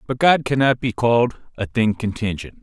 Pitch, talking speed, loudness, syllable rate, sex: 115 Hz, 185 wpm, -19 LUFS, 5.1 syllables/s, male